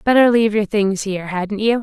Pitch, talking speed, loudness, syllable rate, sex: 210 Hz, 230 wpm, -17 LUFS, 5.8 syllables/s, female